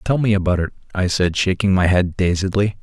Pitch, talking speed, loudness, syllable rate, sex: 95 Hz, 215 wpm, -18 LUFS, 5.7 syllables/s, male